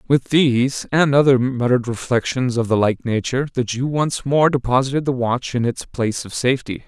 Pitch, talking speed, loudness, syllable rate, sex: 130 Hz, 190 wpm, -19 LUFS, 5.5 syllables/s, male